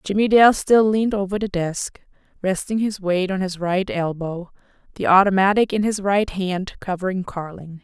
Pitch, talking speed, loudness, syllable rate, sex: 190 Hz, 170 wpm, -20 LUFS, 4.8 syllables/s, female